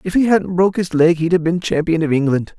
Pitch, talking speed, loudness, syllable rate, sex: 165 Hz, 280 wpm, -16 LUFS, 6.0 syllables/s, male